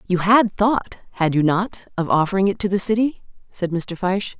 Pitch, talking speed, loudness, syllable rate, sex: 195 Hz, 205 wpm, -20 LUFS, 5.1 syllables/s, female